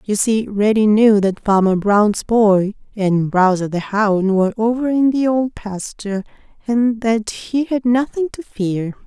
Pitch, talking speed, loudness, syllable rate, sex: 215 Hz, 165 wpm, -17 LUFS, 4.0 syllables/s, female